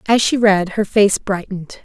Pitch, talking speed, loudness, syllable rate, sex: 200 Hz, 195 wpm, -16 LUFS, 4.8 syllables/s, female